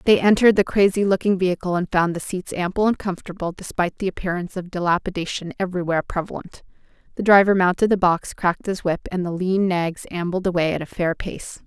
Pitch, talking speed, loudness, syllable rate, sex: 185 Hz, 195 wpm, -21 LUFS, 6.3 syllables/s, female